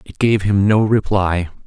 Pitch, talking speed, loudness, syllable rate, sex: 100 Hz, 180 wpm, -16 LUFS, 4.3 syllables/s, male